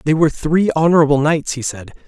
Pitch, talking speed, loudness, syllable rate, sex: 150 Hz, 205 wpm, -15 LUFS, 6.2 syllables/s, male